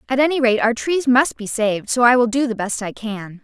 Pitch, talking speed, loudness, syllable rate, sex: 240 Hz, 280 wpm, -18 LUFS, 5.5 syllables/s, female